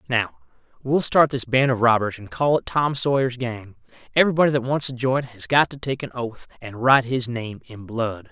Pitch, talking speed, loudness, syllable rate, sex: 125 Hz, 215 wpm, -21 LUFS, 5.2 syllables/s, male